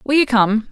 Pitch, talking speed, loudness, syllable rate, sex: 240 Hz, 255 wpm, -15 LUFS, 4.9 syllables/s, female